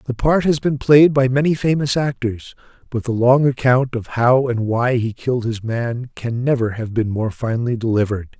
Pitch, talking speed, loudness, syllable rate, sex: 125 Hz, 200 wpm, -18 LUFS, 5.0 syllables/s, male